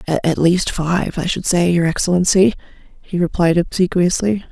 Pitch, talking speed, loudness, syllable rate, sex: 175 Hz, 145 wpm, -16 LUFS, 4.7 syllables/s, female